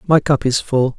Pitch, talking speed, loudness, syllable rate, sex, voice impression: 140 Hz, 245 wpm, -16 LUFS, 4.7 syllables/s, male, very masculine, adult-like, slightly tensed, powerful, dark, soft, clear, fluent, cool, intellectual, very refreshing, sincere, very calm, mature, friendly, very reassuring, unique, slightly elegant, wild, sweet, lively, very kind, slightly intense